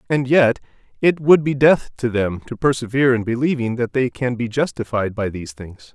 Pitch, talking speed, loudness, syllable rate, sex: 125 Hz, 200 wpm, -19 LUFS, 5.3 syllables/s, male